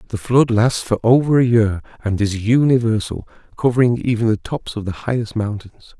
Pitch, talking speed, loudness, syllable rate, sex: 115 Hz, 180 wpm, -18 LUFS, 5.2 syllables/s, male